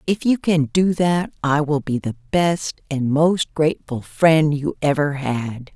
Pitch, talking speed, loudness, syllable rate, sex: 150 Hz, 175 wpm, -20 LUFS, 3.8 syllables/s, female